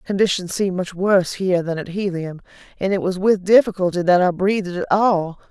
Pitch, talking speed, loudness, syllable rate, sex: 185 Hz, 195 wpm, -19 LUFS, 5.7 syllables/s, female